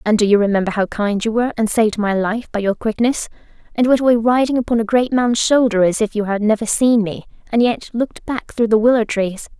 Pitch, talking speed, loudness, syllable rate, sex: 225 Hz, 245 wpm, -17 LUFS, 5.9 syllables/s, female